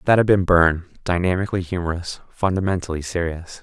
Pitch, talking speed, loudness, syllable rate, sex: 90 Hz, 130 wpm, -21 LUFS, 6.2 syllables/s, male